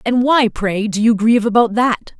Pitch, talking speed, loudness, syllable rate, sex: 225 Hz, 220 wpm, -15 LUFS, 4.9 syllables/s, female